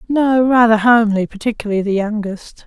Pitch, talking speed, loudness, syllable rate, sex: 220 Hz, 135 wpm, -15 LUFS, 5.6 syllables/s, female